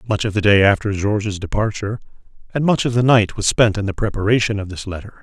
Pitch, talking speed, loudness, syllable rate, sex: 105 Hz, 230 wpm, -18 LUFS, 6.4 syllables/s, male